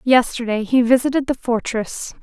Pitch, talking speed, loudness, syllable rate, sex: 245 Hz, 135 wpm, -19 LUFS, 4.8 syllables/s, female